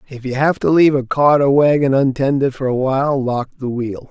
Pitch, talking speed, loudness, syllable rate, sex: 135 Hz, 235 wpm, -16 LUFS, 5.5 syllables/s, male